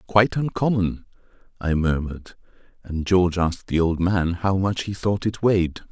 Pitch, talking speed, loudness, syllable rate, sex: 90 Hz, 160 wpm, -22 LUFS, 5.2 syllables/s, male